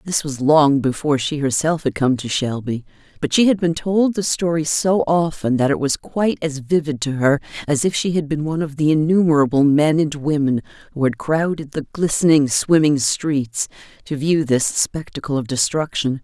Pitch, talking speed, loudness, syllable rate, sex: 150 Hz, 190 wpm, -18 LUFS, 5.0 syllables/s, female